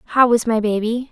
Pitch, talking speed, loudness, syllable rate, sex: 230 Hz, 215 wpm, -17 LUFS, 4.7 syllables/s, female